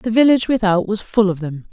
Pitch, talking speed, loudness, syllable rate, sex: 205 Hz, 245 wpm, -17 LUFS, 6.0 syllables/s, female